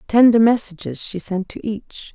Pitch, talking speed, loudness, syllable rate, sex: 205 Hz, 170 wpm, -18 LUFS, 4.5 syllables/s, female